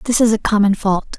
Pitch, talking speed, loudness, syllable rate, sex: 210 Hz, 255 wpm, -16 LUFS, 5.8 syllables/s, female